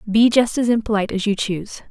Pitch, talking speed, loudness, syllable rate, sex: 215 Hz, 220 wpm, -19 LUFS, 6.4 syllables/s, female